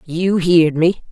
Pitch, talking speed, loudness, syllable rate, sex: 170 Hz, 160 wpm, -15 LUFS, 3.1 syllables/s, female